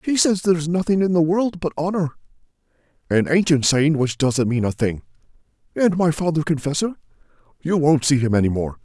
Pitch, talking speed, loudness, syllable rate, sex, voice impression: 155 Hz, 185 wpm, -20 LUFS, 5.6 syllables/s, male, masculine, adult-like, very middle-aged, thick, tensed, powerful, very bright, soft, clear, slightly fluent, cool, intellectual, very refreshing, slightly calm, friendly, reassuring, very unique, slightly elegant, wild, very lively, slightly kind, intense